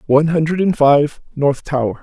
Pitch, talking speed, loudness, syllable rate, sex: 145 Hz, 180 wpm, -16 LUFS, 5.2 syllables/s, male